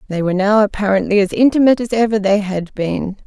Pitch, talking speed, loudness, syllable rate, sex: 205 Hz, 200 wpm, -15 LUFS, 6.3 syllables/s, female